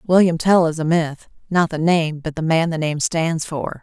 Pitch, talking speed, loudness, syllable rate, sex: 165 Hz, 220 wpm, -19 LUFS, 4.7 syllables/s, female